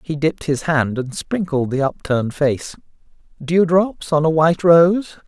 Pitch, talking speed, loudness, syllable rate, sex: 155 Hz, 170 wpm, -18 LUFS, 4.5 syllables/s, male